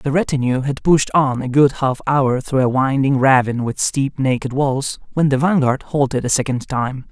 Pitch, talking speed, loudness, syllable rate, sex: 135 Hz, 200 wpm, -17 LUFS, 4.8 syllables/s, male